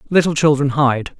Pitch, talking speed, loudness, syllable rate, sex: 145 Hz, 150 wpm, -16 LUFS, 5.1 syllables/s, male